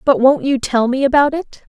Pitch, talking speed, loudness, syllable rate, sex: 260 Hz, 240 wpm, -15 LUFS, 5.0 syllables/s, female